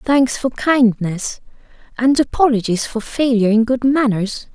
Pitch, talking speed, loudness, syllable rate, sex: 240 Hz, 130 wpm, -17 LUFS, 4.4 syllables/s, female